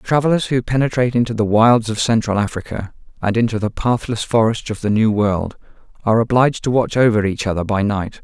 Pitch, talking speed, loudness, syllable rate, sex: 110 Hz, 195 wpm, -17 LUFS, 5.9 syllables/s, male